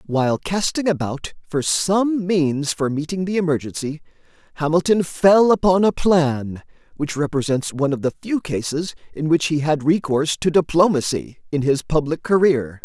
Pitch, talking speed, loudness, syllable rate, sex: 160 Hz, 155 wpm, -19 LUFS, 4.8 syllables/s, male